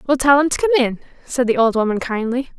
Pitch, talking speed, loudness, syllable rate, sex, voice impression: 255 Hz, 255 wpm, -17 LUFS, 6.3 syllables/s, female, feminine, slightly young, relaxed, powerful, bright, soft, slightly raspy, cute, intellectual, elegant, lively, intense